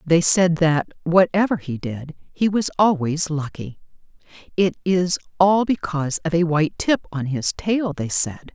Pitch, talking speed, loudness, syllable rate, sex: 165 Hz, 160 wpm, -20 LUFS, 4.3 syllables/s, female